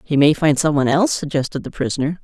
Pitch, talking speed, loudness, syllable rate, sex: 155 Hz, 240 wpm, -18 LUFS, 7.0 syllables/s, female